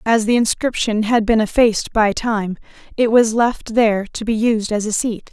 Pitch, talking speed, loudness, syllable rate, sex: 220 Hz, 205 wpm, -17 LUFS, 4.8 syllables/s, female